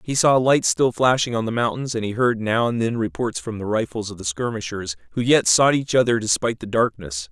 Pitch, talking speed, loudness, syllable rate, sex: 115 Hz, 240 wpm, -21 LUFS, 5.6 syllables/s, male